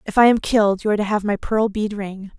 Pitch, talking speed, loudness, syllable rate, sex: 210 Hz, 300 wpm, -19 LUFS, 6.3 syllables/s, female